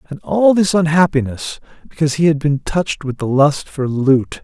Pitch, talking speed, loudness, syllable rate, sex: 150 Hz, 190 wpm, -16 LUFS, 4.9 syllables/s, male